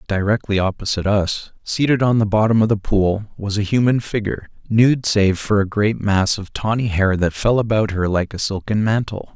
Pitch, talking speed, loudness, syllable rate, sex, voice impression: 105 Hz, 200 wpm, -18 LUFS, 5.1 syllables/s, male, masculine, adult-like, slightly thick, cool, slightly refreshing, sincere